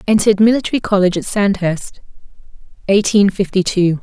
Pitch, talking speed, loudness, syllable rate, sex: 200 Hz, 120 wpm, -15 LUFS, 5.9 syllables/s, female